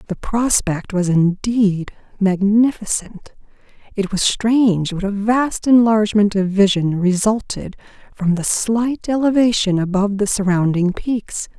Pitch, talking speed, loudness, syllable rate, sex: 205 Hz, 120 wpm, -17 LUFS, 4.2 syllables/s, female